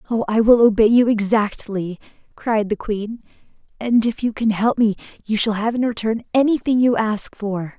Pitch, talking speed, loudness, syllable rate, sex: 220 Hz, 185 wpm, -19 LUFS, 4.8 syllables/s, female